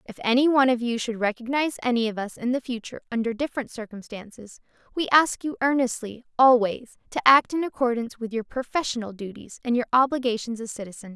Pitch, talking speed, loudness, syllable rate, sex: 240 Hz, 185 wpm, -24 LUFS, 6.3 syllables/s, female